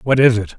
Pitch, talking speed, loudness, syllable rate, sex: 115 Hz, 305 wpm, -14 LUFS, 6.1 syllables/s, male